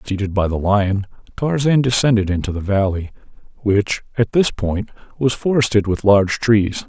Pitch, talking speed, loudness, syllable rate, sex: 105 Hz, 155 wpm, -18 LUFS, 5.1 syllables/s, male